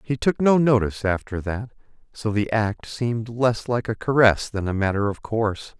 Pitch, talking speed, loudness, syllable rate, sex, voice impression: 110 Hz, 195 wpm, -22 LUFS, 5.1 syllables/s, male, masculine, adult-like, slightly thick, slightly intellectual, slightly calm